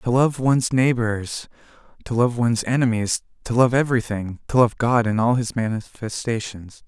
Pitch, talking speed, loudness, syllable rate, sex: 115 Hz, 155 wpm, -21 LUFS, 5.0 syllables/s, male